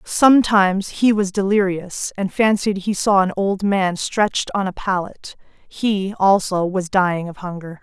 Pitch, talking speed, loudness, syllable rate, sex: 195 Hz, 160 wpm, -18 LUFS, 4.3 syllables/s, female